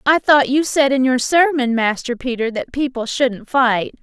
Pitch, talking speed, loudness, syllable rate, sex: 260 Hz, 195 wpm, -17 LUFS, 4.5 syllables/s, female